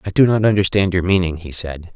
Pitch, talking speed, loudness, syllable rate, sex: 90 Hz, 245 wpm, -17 LUFS, 6.0 syllables/s, male